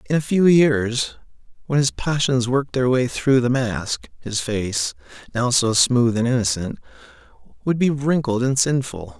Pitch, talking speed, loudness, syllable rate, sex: 125 Hz, 165 wpm, -20 LUFS, 4.4 syllables/s, male